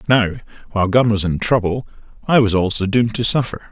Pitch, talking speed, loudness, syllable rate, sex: 110 Hz, 195 wpm, -17 LUFS, 6.5 syllables/s, male